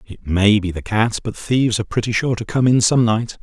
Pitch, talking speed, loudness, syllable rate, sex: 110 Hz, 280 wpm, -18 LUFS, 6.8 syllables/s, male